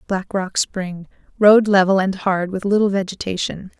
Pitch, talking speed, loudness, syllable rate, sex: 190 Hz, 140 wpm, -18 LUFS, 4.6 syllables/s, female